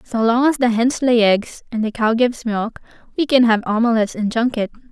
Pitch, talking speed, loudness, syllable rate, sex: 230 Hz, 220 wpm, -18 LUFS, 5.5 syllables/s, female